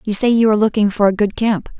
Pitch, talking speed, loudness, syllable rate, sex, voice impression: 210 Hz, 300 wpm, -15 LUFS, 6.8 syllables/s, female, very feminine, adult-like, slightly middle-aged, very thin, very tensed, powerful, very bright, hard, very clear, very fluent, slightly raspy, slightly cute, cool, slightly intellectual, very refreshing, sincere, slightly calm, very unique, very elegant, wild, sweet, strict, intense, very sharp, light